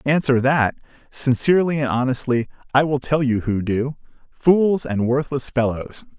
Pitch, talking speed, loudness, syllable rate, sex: 135 Hz, 145 wpm, -20 LUFS, 4.5 syllables/s, male